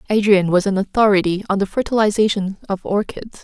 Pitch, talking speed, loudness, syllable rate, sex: 200 Hz, 155 wpm, -18 LUFS, 5.9 syllables/s, female